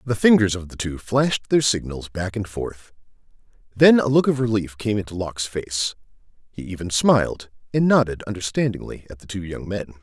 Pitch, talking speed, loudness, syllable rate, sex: 105 Hz, 185 wpm, -21 LUFS, 5.5 syllables/s, male